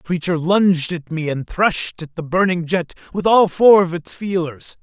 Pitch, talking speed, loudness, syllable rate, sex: 175 Hz, 210 wpm, -18 LUFS, 5.0 syllables/s, male